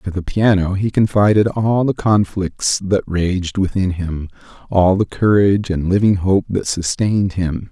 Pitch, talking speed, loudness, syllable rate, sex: 95 Hz, 165 wpm, -17 LUFS, 4.3 syllables/s, male